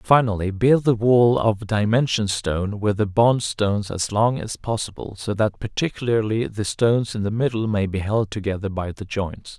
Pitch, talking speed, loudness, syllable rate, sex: 110 Hz, 190 wpm, -21 LUFS, 4.8 syllables/s, male